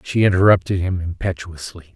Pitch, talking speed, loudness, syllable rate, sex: 90 Hz, 125 wpm, -18 LUFS, 5.4 syllables/s, male